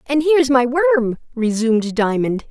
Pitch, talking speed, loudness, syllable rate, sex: 245 Hz, 145 wpm, -17 LUFS, 6.0 syllables/s, female